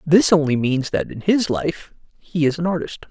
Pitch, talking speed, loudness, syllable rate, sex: 160 Hz, 215 wpm, -20 LUFS, 4.7 syllables/s, male